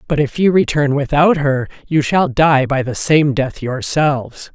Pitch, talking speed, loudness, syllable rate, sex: 145 Hz, 185 wpm, -15 LUFS, 4.3 syllables/s, female